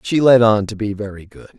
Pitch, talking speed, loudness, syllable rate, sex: 110 Hz, 265 wpm, -15 LUFS, 5.6 syllables/s, male